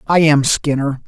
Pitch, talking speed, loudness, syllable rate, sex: 145 Hz, 165 wpm, -15 LUFS, 4.4 syllables/s, male